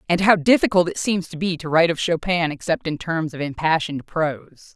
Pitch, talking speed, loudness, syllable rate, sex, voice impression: 165 Hz, 215 wpm, -20 LUFS, 5.7 syllables/s, female, very feminine, very adult-like, slightly thin, very tensed, very powerful, bright, hard, very clear, fluent, very cool, very intellectual, very refreshing, very sincere, calm, very friendly, very reassuring, very unique, elegant, very wild, slightly sweet, very lively, slightly kind, intense, slightly light